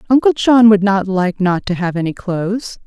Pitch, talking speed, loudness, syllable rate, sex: 200 Hz, 210 wpm, -15 LUFS, 5.0 syllables/s, female